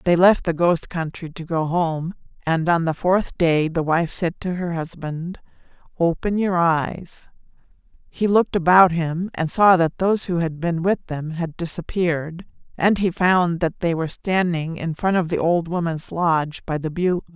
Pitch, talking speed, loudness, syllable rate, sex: 170 Hz, 185 wpm, -21 LUFS, 4.6 syllables/s, female